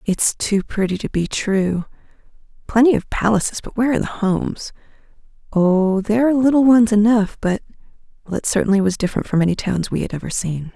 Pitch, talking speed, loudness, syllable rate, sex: 205 Hz, 175 wpm, -18 LUFS, 6.0 syllables/s, female